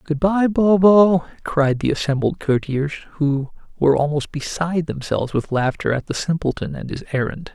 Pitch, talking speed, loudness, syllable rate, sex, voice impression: 155 Hz, 160 wpm, -20 LUFS, 5.0 syllables/s, male, masculine, adult-like, slightly refreshing, slightly unique, slightly kind